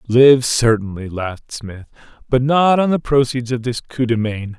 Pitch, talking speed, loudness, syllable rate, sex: 120 Hz, 185 wpm, -17 LUFS, 4.5 syllables/s, male